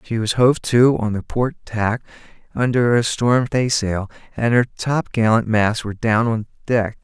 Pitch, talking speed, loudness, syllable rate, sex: 115 Hz, 170 wpm, -19 LUFS, 4.2 syllables/s, male